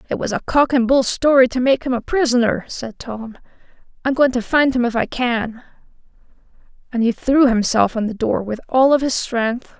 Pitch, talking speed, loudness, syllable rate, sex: 245 Hz, 210 wpm, -18 LUFS, 5.1 syllables/s, female